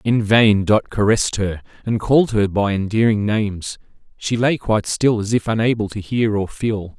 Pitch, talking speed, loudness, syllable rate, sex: 105 Hz, 190 wpm, -18 LUFS, 5.2 syllables/s, male